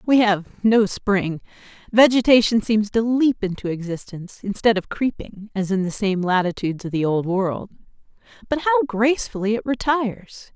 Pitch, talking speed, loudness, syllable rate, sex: 215 Hz, 155 wpm, -20 LUFS, 5.0 syllables/s, female